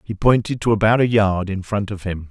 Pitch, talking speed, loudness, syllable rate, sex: 105 Hz, 260 wpm, -19 LUFS, 5.4 syllables/s, male